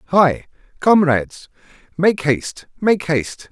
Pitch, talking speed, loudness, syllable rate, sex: 160 Hz, 100 wpm, -17 LUFS, 4.3 syllables/s, male